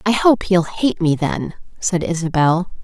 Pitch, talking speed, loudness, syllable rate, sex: 180 Hz, 170 wpm, -18 LUFS, 4.3 syllables/s, female